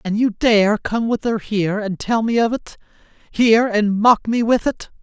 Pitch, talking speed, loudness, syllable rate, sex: 220 Hz, 215 wpm, -18 LUFS, 4.7 syllables/s, male